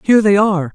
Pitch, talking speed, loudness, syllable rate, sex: 195 Hz, 240 wpm, -13 LUFS, 7.7 syllables/s, male